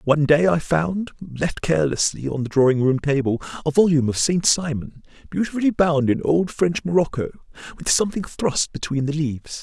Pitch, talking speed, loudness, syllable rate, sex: 155 Hz, 175 wpm, -21 LUFS, 5.5 syllables/s, male